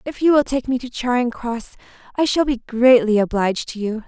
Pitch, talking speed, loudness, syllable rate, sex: 245 Hz, 220 wpm, -19 LUFS, 5.4 syllables/s, female